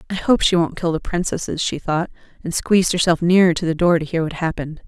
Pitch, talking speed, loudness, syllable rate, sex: 170 Hz, 245 wpm, -19 LUFS, 6.3 syllables/s, female